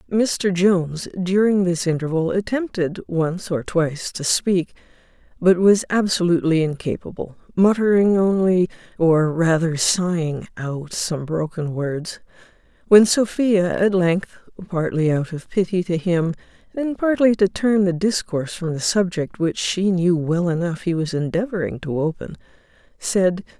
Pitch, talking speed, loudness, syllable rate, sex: 180 Hz, 135 wpm, -20 LUFS, 4.4 syllables/s, female